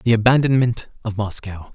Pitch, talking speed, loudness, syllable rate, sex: 115 Hz, 140 wpm, -19 LUFS, 5.3 syllables/s, male